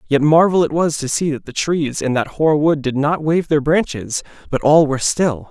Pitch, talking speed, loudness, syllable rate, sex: 150 Hz, 240 wpm, -17 LUFS, 5.0 syllables/s, male